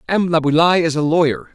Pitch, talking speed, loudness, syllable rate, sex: 165 Hz, 195 wpm, -16 LUFS, 5.8 syllables/s, male